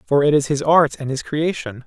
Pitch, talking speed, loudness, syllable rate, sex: 145 Hz, 260 wpm, -18 LUFS, 5.3 syllables/s, male